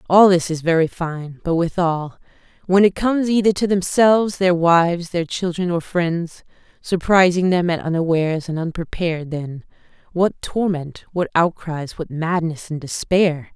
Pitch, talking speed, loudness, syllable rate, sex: 170 Hz, 150 wpm, -19 LUFS, 4.6 syllables/s, female